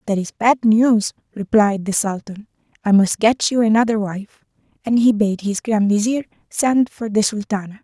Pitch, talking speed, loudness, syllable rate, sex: 215 Hz, 175 wpm, -18 LUFS, 4.6 syllables/s, female